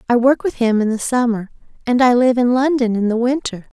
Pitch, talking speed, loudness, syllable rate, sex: 240 Hz, 240 wpm, -16 LUFS, 5.6 syllables/s, female